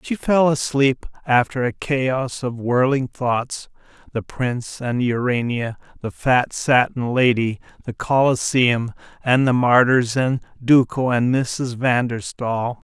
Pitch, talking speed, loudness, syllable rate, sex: 125 Hz, 135 wpm, -19 LUFS, 3.7 syllables/s, male